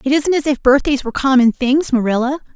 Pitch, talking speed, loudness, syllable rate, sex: 270 Hz, 210 wpm, -15 LUFS, 6.1 syllables/s, female